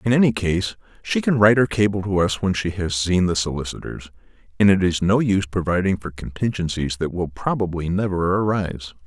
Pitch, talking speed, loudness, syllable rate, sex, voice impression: 95 Hz, 190 wpm, -21 LUFS, 5.6 syllables/s, male, masculine, adult-like, slightly thick, slightly muffled, cool, slightly calm